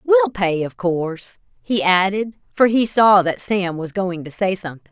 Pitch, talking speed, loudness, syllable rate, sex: 195 Hz, 195 wpm, -18 LUFS, 4.6 syllables/s, female